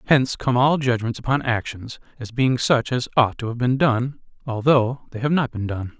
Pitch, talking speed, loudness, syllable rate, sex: 125 Hz, 210 wpm, -21 LUFS, 5.2 syllables/s, male